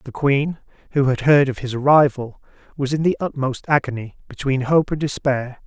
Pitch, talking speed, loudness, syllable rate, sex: 135 Hz, 180 wpm, -19 LUFS, 5.1 syllables/s, male